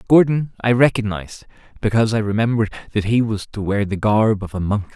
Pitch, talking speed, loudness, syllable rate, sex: 110 Hz, 195 wpm, -19 LUFS, 6.2 syllables/s, male